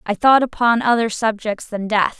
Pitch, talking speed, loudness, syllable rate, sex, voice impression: 225 Hz, 190 wpm, -17 LUFS, 4.8 syllables/s, female, feminine, adult-like, slightly cute, slightly intellectual, slightly friendly, slightly sweet